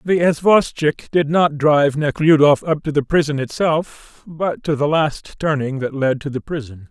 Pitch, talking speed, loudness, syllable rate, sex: 150 Hz, 185 wpm, -18 LUFS, 4.4 syllables/s, male